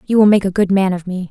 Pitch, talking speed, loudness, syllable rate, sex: 190 Hz, 365 wpm, -15 LUFS, 6.8 syllables/s, female